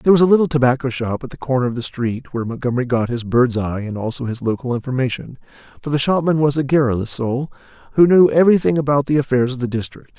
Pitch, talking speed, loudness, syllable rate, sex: 130 Hz, 230 wpm, -18 LUFS, 6.7 syllables/s, male